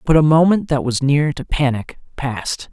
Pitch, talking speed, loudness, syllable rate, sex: 140 Hz, 200 wpm, -17 LUFS, 4.9 syllables/s, male